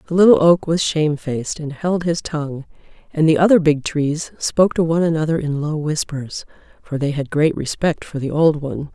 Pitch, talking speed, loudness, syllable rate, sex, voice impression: 155 Hz, 200 wpm, -18 LUFS, 5.5 syllables/s, female, feminine, adult-like, tensed, slightly bright, clear, fluent, intellectual, calm, friendly, reassuring, elegant, kind